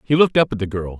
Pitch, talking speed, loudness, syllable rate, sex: 120 Hz, 365 wpm, -18 LUFS, 7.9 syllables/s, male